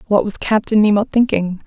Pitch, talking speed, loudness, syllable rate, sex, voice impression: 210 Hz, 180 wpm, -16 LUFS, 5.4 syllables/s, female, very feminine, slightly young, slightly adult-like, thin, slightly relaxed, slightly weak, slightly dark, hard, clear, fluent, cute, intellectual, slightly refreshing, sincere, calm, friendly, reassuring, slightly unique, elegant, slightly sweet, very kind, slightly modest